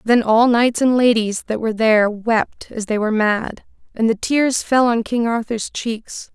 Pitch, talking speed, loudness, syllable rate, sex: 225 Hz, 200 wpm, -17 LUFS, 4.4 syllables/s, female